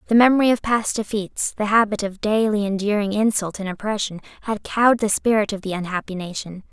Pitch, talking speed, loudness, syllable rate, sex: 210 Hz, 190 wpm, -21 LUFS, 5.8 syllables/s, female